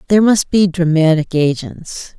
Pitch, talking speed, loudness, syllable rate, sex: 170 Hz, 135 wpm, -14 LUFS, 4.6 syllables/s, female